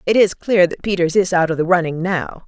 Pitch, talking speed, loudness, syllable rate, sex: 180 Hz, 265 wpm, -17 LUFS, 5.6 syllables/s, female